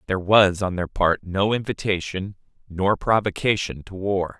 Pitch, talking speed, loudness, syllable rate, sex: 95 Hz, 150 wpm, -22 LUFS, 4.7 syllables/s, male